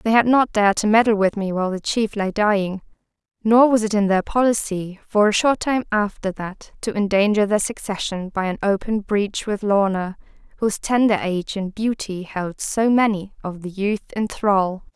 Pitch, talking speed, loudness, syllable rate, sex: 205 Hz, 195 wpm, -20 LUFS, 4.9 syllables/s, female